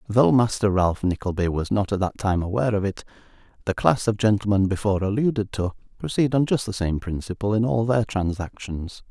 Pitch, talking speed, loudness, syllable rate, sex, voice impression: 100 Hz, 190 wpm, -23 LUFS, 5.6 syllables/s, male, masculine, adult-like, slightly thick, slightly intellectual, sincere, calm